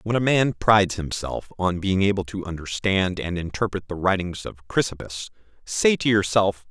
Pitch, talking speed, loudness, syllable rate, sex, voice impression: 95 Hz, 170 wpm, -23 LUFS, 4.9 syllables/s, male, masculine, adult-like, slightly refreshing, sincere, slightly friendly, slightly elegant